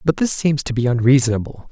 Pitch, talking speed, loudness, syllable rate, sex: 135 Hz, 210 wpm, -17 LUFS, 6.2 syllables/s, male